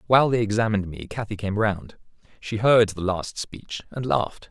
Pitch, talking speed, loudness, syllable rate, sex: 105 Hz, 185 wpm, -24 LUFS, 5.2 syllables/s, male